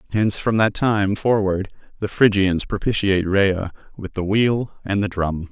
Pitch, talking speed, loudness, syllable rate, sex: 100 Hz, 165 wpm, -20 LUFS, 4.6 syllables/s, male